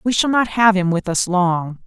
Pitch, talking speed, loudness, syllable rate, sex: 195 Hz, 255 wpm, -17 LUFS, 4.7 syllables/s, female